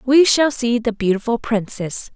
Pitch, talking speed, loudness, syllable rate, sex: 235 Hz, 165 wpm, -18 LUFS, 4.4 syllables/s, female